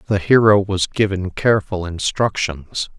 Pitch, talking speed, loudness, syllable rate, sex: 95 Hz, 120 wpm, -18 LUFS, 4.4 syllables/s, male